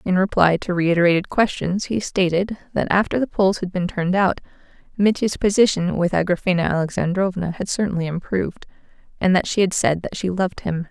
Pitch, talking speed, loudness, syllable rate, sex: 185 Hz, 175 wpm, -20 LUFS, 5.9 syllables/s, female